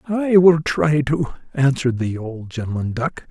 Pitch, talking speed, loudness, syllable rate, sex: 140 Hz, 165 wpm, -19 LUFS, 4.6 syllables/s, male